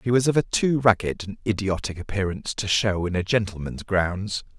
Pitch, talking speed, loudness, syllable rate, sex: 100 Hz, 195 wpm, -24 LUFS, 5.3 syllables/s, male